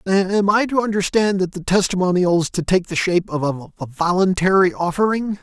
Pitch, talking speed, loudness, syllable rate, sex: 185 Hz, 175 wpm, -18 LUFS, 5.2 syllables/s, male